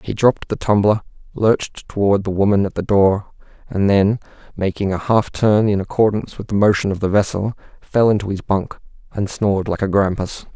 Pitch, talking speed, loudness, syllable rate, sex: 100 Hz, 195 wpm, -18 LUFS, 5.5 syllables/s, male